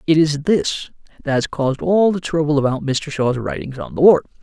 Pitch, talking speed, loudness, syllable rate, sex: 150 Hz, 215 wpm, -18 LUFS, 5.3 syllables/s, male